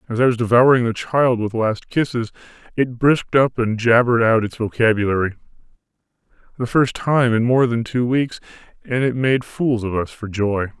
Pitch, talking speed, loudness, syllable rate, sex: 120 Hz, 185 wpm, -18 LUFS, 5.1 syllables/s, male